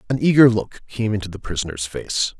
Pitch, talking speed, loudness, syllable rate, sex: 105 Hz, 200 wpm, -20 LUFS, 5.6 syllables/s, male